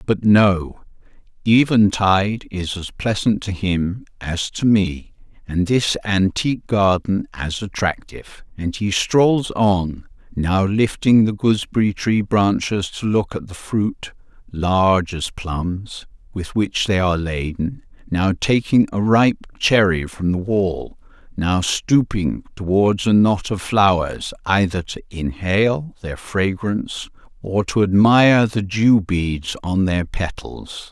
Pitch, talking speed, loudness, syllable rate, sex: 100 Hz, 130 wpm, -19 LUFS, 3.7 syllables/s, male